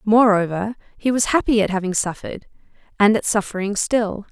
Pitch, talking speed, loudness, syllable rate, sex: 210 Hz, 155 wpm, -19 LUFS, 5.5 syllables/s, female